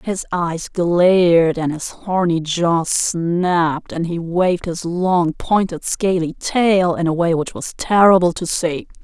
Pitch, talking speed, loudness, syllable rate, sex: 175 Hz, 160 wpm, -17 LUFS, 3.7 syllables/s, female